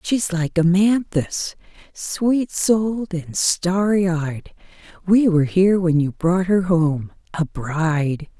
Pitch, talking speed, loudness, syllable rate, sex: 175 Hz, 120 wpm, -19 LUFS, 3.5 syllables/s, female